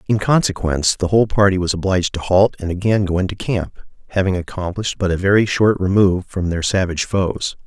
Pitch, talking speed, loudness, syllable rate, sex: 95 Hz, 195 wpm, -18 LUFS, 6.1 syllables/s, male